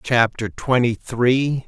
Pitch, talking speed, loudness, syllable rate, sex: 125 Hz, 110 wpm, -19 LUFS, 3.2 syllables/s, male